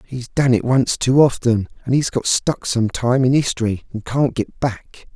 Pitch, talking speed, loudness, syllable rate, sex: 125 Hz, 210 wpm, -18 LUFS, 4.4 syllables/s, male